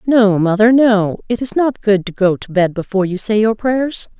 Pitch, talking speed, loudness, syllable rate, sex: 210 Hz, 230 wpm, -15 LUFS, 4.9 syllables/s, female